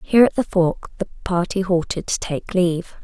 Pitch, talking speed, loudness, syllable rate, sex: 185 Hz, 200 wpm, -20 LUFS, 5.3 syllables/s, female